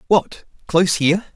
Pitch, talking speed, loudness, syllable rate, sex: 175 Hz, 135 wpm, -18 LUFS, 5.5 syllables/s, male